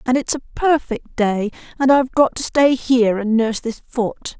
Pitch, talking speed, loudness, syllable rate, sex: 245 Hz, 190 wpm, -18 LUFS, 5.0 syllables/s, female